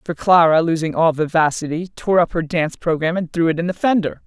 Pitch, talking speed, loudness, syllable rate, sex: 165 Hz, 225 wpm, -18 LUFS, 6.0 syllables/s, female